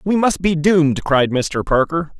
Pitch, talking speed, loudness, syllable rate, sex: 160 Hz, 190 wpm, -17 LUFS, 4.4 syllables/s, male